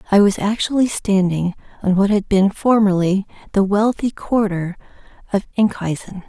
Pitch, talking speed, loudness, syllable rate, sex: 200 Hz, 135 wpm, -18 LUFS, 4.7 syllables/s, female